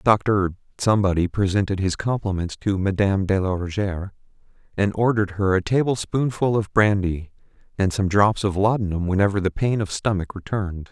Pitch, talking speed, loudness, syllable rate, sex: 100 Hz, 160 wpm, -22 LUFS, 5.6 syllables/s, male